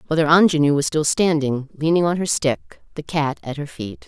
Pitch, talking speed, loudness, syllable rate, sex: 150 Hz, 205 wpm, -19 LUFS, 5.2 syllables/s, female